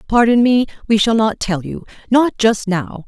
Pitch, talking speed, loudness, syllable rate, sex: 220 Hz, 175 wpm, -15 LUFS, 4.5 syllables/s, female